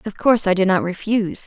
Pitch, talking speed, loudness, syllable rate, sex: 205 Hz, 245 wpm, -18 LUFS, 6.6 syllables/s, female